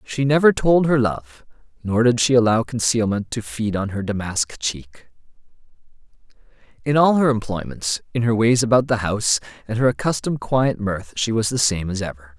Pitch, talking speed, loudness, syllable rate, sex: 115 Hz, 180 wpm, -20 LUFS, 5.1 syllables/s, male